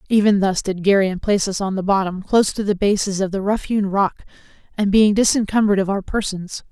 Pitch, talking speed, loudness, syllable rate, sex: 200 Hz, 215 wpm, -19 LUFS, 5.9 syllables/s, female